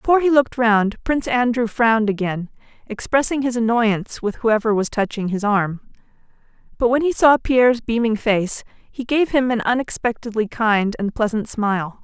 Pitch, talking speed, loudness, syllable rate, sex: 230 Hz, 165 wpm, -19 LUFS, 5.1 syllables/s, female